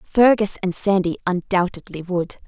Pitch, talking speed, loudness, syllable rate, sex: 190 Hz, 120 wpm, -20 LUFS, 4.5 syllables/s, female